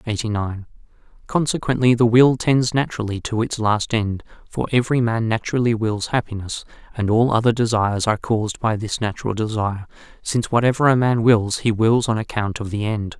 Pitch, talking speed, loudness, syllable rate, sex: 115 Hz, 175 wpm, -20 LUFS, 5.7 syllables/s, male